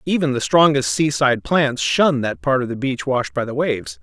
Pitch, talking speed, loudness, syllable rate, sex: 135 Hz, 225 wpm, -18 LUFS, 5.1 syllables/s, male